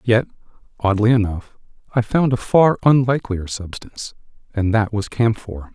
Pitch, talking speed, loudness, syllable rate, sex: 110 Hz, 135 wpm, -19 LUFS, 4.9 syllables/s, male